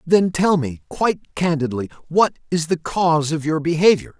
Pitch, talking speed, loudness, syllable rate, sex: 160 Hz, 170 wpm, -19 LUFS, 5.0 syllables/s, male